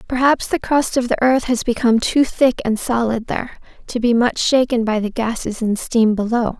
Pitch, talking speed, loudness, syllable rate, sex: 235 Hz, 210 wpm, -18 LUFS, 5.2 syllables/s, female